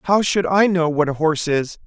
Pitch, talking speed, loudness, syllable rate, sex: 170 Hz, 255 wpm, -18 LUFS, 5.5 syllables/s, male